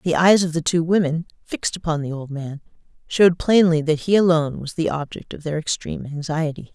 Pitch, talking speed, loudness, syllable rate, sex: 160 Hz, 205 wpm, -20 LUFS, 5.8 syllables/s, female